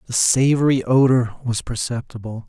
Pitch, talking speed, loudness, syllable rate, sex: 120 Hz, 120 wpm, -18 LUFS, 4.9 syllables/s, male